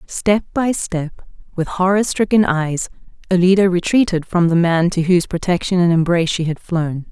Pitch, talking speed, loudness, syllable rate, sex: 175 Hz, 170 wpm, -17 LUFS, 5.1 syllables/s, female